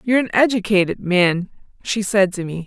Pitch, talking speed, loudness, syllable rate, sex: 200 Hz, 180 wpm, -18 LUFS, 5.4 syllables/s, female